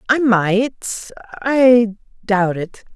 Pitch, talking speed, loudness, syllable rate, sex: 220 Hz, 60 wpm, -16 LUFS, 2.4 syllables/s, female